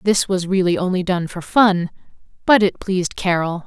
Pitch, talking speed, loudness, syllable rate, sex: 185 Hz, 180 wpm, -18 LUFS, 5.0 syllables/s, female